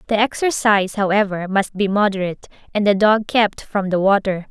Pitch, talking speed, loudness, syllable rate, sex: 205 Hz, 175 wpm, -18 LUFS, 5.5 syllables/s, female